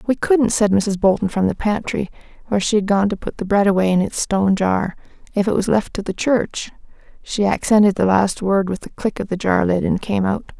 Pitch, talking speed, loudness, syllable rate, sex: 200 Hz, 245 wpm, -18 LUFS, 5.5 syllables/s, female